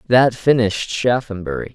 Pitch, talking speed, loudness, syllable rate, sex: 110 Hz, 105 wpm, -18 LUFS, 5.1 syllables/s, male